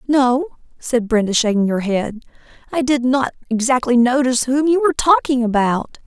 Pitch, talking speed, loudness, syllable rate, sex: 250 Hz, 160 wpm, -17 LUFS, 5.1 syllables/s, female